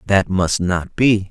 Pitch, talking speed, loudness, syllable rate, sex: 95 Hz, 185 wpm, -18 LUFS, 3.6 syllables/s, male